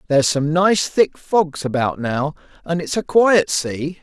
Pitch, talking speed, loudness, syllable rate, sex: 160 Hz, 180 wpm, -18 LUFS, 4.0 syllables/s, male